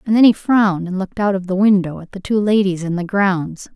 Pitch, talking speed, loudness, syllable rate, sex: 195 Hz, 270 wpm, -17 LUFS, 5.8 syllables/s, female